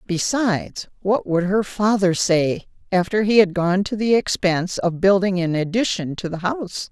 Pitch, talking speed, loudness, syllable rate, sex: 190 Hz, 175 wpm, -20 LUFS, 4.7 syllables/s, female